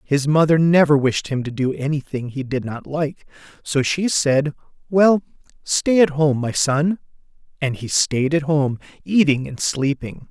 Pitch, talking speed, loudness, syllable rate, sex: 145 Hz, 170 wpm, -19 LUFS, 4.3 syllables/s, male